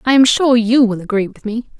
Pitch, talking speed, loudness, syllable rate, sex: 230 Hz, 265 wpm, -14 LUFS, 5.6 syllables/s, female